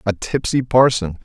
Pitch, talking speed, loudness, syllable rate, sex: 115 Hz, 145 wpm, -17 LUFS, 4.6 syllables/s, male